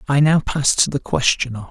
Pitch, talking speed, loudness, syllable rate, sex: 140 Hz, 245 wpm, -17 LUFS, 5.2 syllables/s, male